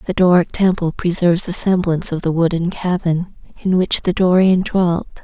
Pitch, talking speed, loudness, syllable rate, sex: 175 Hz, 170 wpm, -17 LUFS, 5.1 syllables/s, female